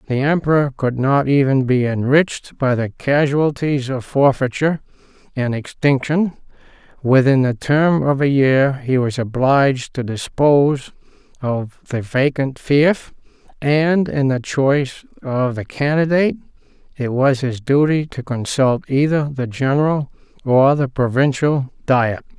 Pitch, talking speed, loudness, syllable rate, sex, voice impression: 135 Hz, 130 wpm, -17 LUFS, 4.3 syllables/s, male, masculine, adult-like, muffled, slightly friendly, slightly unique